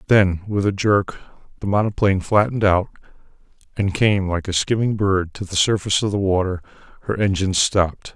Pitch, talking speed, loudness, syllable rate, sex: 95 Hz, 170 wpm, -19 LUFS, 5.7 syllables/s, male